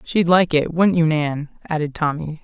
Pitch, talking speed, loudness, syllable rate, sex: 160 Hz, 195 wpm, -19 LUFS, 4.7 syllables/s, female